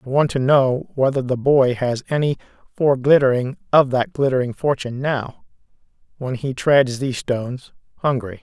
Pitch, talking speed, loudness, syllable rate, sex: 130 Hz, 150 wpm, -19 LUFS, 5.2 syllables/s, male